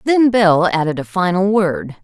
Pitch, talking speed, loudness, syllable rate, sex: 185 Hz, 175 wpm, -15 LUFS, 4.8 syllables/s, female